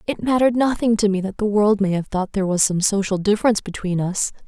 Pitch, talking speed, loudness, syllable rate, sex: 205 Hz, 240 wpm, -19 LUFS, 6.4 syllables/s, female